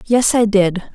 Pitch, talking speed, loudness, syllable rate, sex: 210 Hz, 190 wpm, -15 LUFS, 3.6 syllables/s, female